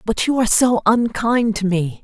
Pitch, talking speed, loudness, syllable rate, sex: 215 Hz, 205 wpm, -17 LUFS, 4.9 syllables/s, female